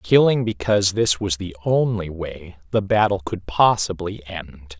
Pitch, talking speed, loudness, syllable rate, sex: 95 Hz, 150 wpm, -21 LUFS, 4.3 syllables/s, male